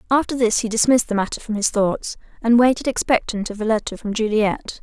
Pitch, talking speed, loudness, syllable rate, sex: 225 Hz, 210 wpm, -20 LUFS, 6.0 syllables/s, female